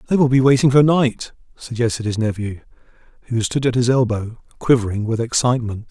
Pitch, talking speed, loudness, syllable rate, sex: 120 Hz, 175 wpm, -18 LUFS, 5.8 syllables/s, male